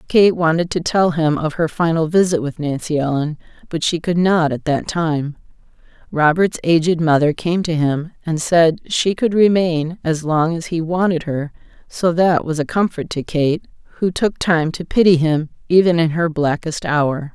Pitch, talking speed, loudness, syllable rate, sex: 165 Hz, 185 wpm, -17 LUFS, 4.5 syllables/s, female